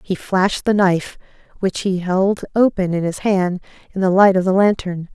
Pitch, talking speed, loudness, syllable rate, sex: 190 Hz, 200 wpm, -17 LUFS, 5.0 syllables/s, female